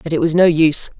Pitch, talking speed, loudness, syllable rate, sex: 160 Hz, 300 wpm, -14 LUFS, 6.7 syllables/s, female